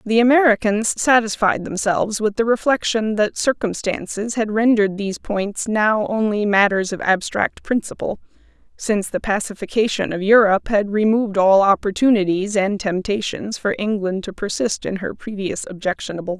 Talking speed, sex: 145 wpm, female